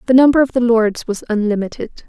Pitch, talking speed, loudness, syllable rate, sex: 230 Hz, 200 wpm, -15 LUFS, 6.0 syllables/s, female